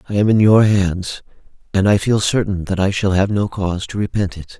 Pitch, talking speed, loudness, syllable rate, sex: 100 Hz, 235 wpm, -17 LUFS, 5.4 syllables/s, male